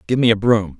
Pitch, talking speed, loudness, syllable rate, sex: 110 Hz, 300 wpm, -16 LUFS, 6.2 syllables/s, male